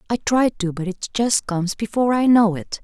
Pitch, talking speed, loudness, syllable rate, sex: 210 Hz, 235 wpm, -19 LUFS, 5.4 syllables/s, female